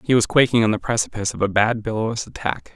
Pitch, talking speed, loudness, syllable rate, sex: 115 Hz, 240 wpm, -20 LUFS, 6.4 syllables/s, male